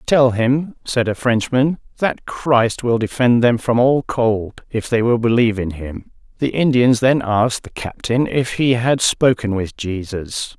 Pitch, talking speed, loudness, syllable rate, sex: 120 Hz, 175 wpm, -17 LUFS, 4.1 syllables/s, male